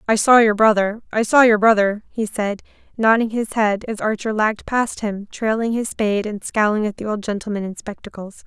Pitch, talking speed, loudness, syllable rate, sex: 215 Hz, 200 wpm, -19 LUFS, 5.3 syllables/s, female